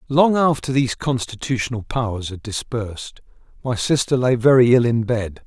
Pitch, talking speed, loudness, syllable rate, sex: 120 Hz, 155 wpm, -19 LUFS, 5.2 syllables/s, male